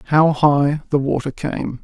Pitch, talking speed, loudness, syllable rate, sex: 145 Hz, 165 wpm, -18 LUFS, 3.6 syllables/s, male